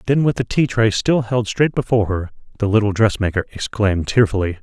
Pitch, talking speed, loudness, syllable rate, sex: 110 Hz, 195 wpm, -18 LUFS, 5.9 syllables/s, male